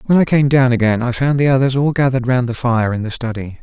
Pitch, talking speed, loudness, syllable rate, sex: 125 Hz, 280 wpm, -15 LUFS, 6.4 syllables/s, male